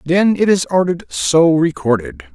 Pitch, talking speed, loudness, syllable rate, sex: 155 Hz, 155 wpm, -15 LUFS, 4.9 syllables/s, male